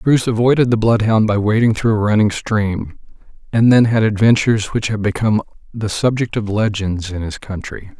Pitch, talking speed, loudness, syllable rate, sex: 110 Hz, 180 wpm, -16 LUFS, 5.4 syllables/s, male